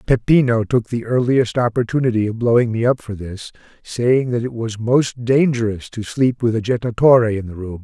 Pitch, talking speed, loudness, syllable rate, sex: 115 Hz, 190 wpm, -18 LUFS, 5.2 syllables/s, male